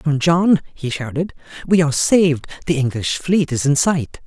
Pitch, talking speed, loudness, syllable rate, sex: 155 Hz, 185 wpm, -18 LUFS, 4.8 syllables/s, male